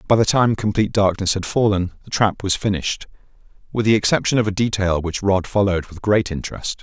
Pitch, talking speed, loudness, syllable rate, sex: 100 Hz, 200 wpm, -19 LUFS, 6.1 syllables/s, male